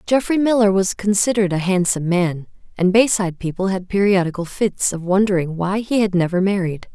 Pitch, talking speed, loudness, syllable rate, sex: 190 Hz, 175 wpm, -18 LUFS, 5.7 syllables/s, female